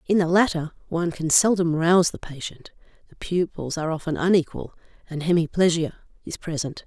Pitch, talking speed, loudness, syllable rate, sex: 165 Hz, 155 wpm, -23 LUFS, 5.7 syllables/s, female